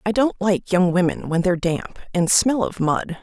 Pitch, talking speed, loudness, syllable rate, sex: 190 Hz, 225 wpm, -20 LUFS, 4.7 syllables/s, female